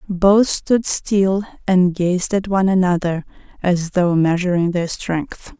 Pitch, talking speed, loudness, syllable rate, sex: 185 Hz, 140 wpm, -17 LUFS, 3.8 syllables/s, female